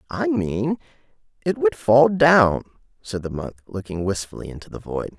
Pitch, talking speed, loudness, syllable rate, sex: 110 Hz, 160 wpm, -21 LUFS, 4.7 syllables/s, male